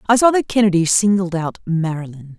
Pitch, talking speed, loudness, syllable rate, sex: 190 Hz, 175 wpm, -17 LUFS, 5.3 syllables/s, female